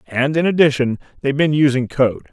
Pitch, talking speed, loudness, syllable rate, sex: 140 Hz, 180 wpm, -17 LUFS, 5.7 syllables/s, male